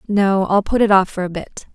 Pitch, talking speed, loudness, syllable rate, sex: 195 Hz, 275 wpm, -16 LUFS, 5.4 syllables/s, female